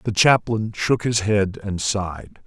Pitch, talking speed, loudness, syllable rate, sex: 105 Hz, 170 wpm, -21 LUFS, 3.9 syllables/s, male